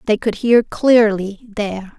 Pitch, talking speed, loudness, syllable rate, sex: 215 Hz, 150 wpm, -16 LUFS, 4.0 syllables/s, female